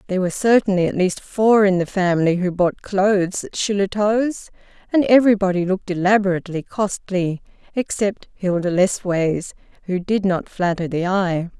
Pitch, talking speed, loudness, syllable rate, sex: 190 Hz, 145 wpm, -19 LUFS, 5.1 syllables/s, female